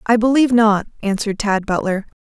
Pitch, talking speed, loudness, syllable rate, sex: 215 Hz, 160 wpm, -17 LUFS, 6.0 syllables/s, female